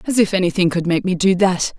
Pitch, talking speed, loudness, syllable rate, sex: 185 Hz, 270 wpm, -17 LUFS, 6.0 syllables/s, female